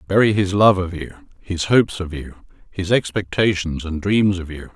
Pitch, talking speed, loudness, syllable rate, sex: 90 Hz, 190 wpm, -19 LUFS, 4.7 syllables/s, male